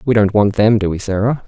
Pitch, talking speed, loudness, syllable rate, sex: 105 Hz, 285 wpm, -15 LUFS, 5.9 syllables/s, male